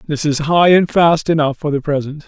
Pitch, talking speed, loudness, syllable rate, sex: 150 Hz, 235 wpm, -14 LUFS, 5.3 syllables/s, male